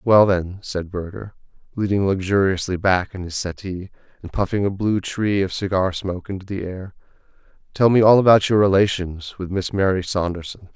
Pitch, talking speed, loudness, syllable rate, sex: 95 Hz, 175 wpm, -20 LUFS, 5.1 syllables/s, male